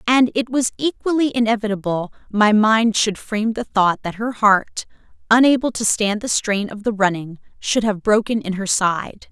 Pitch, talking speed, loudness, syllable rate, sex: 215 Hz, 180 wpm, -18 LUFS, 4.7 syllables/s, female